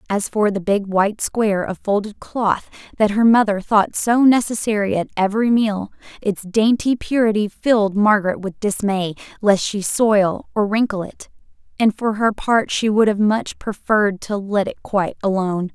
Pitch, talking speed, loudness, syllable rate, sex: 210 Hz, 170 wpm, -18 LUFS, 4.8 syllables/s, female